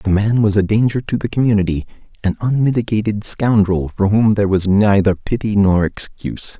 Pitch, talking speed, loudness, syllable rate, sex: 105 Hz, 175 wpm, -16 LUFS, 5.4 syllables/s, male